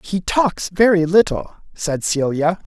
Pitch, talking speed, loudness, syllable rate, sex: 180 Hz, 130 wpm, -18 LUFS, 3.9 syllables/s, male